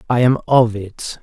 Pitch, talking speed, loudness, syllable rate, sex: 120 Hz, 195 wpm, -16 LUFS, 3.8 syllables/s, male